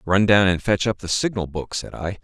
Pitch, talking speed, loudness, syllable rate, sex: 95 Hz, 270 wpm, -21 LUFS, 5.2 syllables/s, male